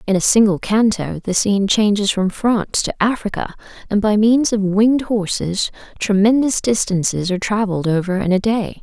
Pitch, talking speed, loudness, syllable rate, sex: 205 Hz, 170 wpm, -17 LUFS, 5.3 syllables/s, female